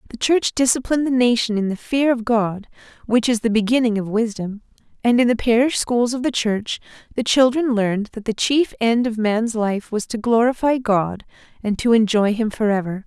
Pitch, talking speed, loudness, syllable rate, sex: 230 Hz, 200 wpm, -19 LUFS, 5.2 syllables/s, female